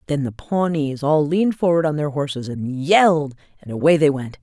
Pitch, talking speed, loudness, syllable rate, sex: 150 Hz, 205 wpm, -19 LUFS, 5.3 syllables/s, female